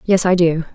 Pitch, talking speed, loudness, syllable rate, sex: 175 Hz, 240 wpm, -15 LUFS, 5.3 syllables/s, female